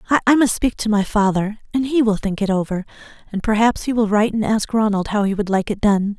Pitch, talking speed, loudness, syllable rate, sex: 215 Hz, 250 wpm, -18 LUFS, 6.2 syllables/s, female